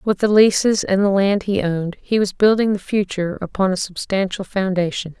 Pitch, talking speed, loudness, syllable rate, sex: 195 Hz, 195 wpm, -18 LUFS, 5.4 syllables/s, female